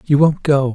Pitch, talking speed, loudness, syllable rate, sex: 140 Hz, 240 wpm, -15 LUFS, 4.6 syllables/s, male